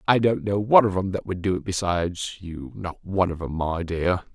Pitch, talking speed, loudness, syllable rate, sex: 95 Hz, 250 wpm, -24 LUFS, 5.5 syllables/s, male